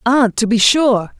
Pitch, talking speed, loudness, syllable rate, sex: 235 Hz, 200 wpm, -13 LUFS, 3.8 syllables/s, female